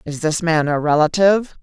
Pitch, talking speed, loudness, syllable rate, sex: 165 Hz, 185 wpm, -17 LUFS, 5.4 syllables/s, female